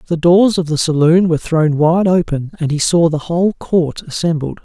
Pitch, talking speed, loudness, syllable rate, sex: 165 Hz, 205 wpm, -14 LUFS, 5.1 syllables/s, male